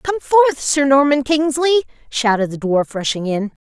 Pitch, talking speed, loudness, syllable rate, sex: 270 Hz, 165 wpm, -16 LUFS, 4.5 syllables/s, female